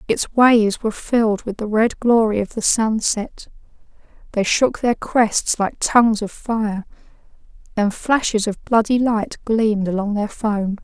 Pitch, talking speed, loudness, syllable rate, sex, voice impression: 220 Hz, 155 wpm, -19 LUFS, 4.3 syllables/s, female, feminine, slightly young, slightly thin, cute, slightly sincere, friendly